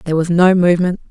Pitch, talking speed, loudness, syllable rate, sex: 175 Hz, 215 wpm, -13 LUFS, 7.9 syllables/s, female